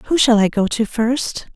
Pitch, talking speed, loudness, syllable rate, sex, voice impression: 230 Hz, 230 wpm, -17 LUFS, 4.1 syllables/s, female, very feminine, slightly middle-aged, thin, slightly tensed, slightly weak, slightly bright, slightly hard, clear, fluent, slightly raspy, slightly cool, intellectual, slightly refreshing, slightly sincere, slightly calm, slightly friendly, slightly reassuring, very unique, elegant, wild, sweet, lively, strict, sharp, light